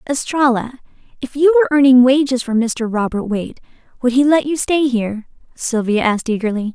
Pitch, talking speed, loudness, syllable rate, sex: 255 Hz, 170 wpm, -16 LUFS, 5.8 syllables/s, female